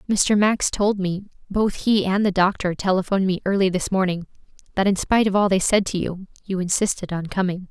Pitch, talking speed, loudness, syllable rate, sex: 190 Hz, 195 wpm, -21 LUFS, 5.7 syllables/s, female